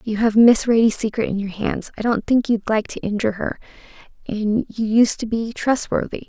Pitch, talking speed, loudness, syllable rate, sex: 220 Hz, 210 wpm, -19 LUFS, 5.2 syllables/s, female